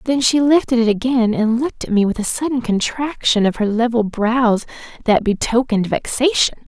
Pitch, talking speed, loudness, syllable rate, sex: 235 Hz, 180 wpm, -17 LUFS, 5.2 syllables/s, female